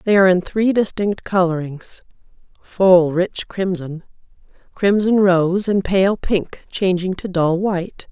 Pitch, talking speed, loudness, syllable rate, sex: 185 Hz, 125 wpm, -18 LUFS, 3.9 syllables/s, female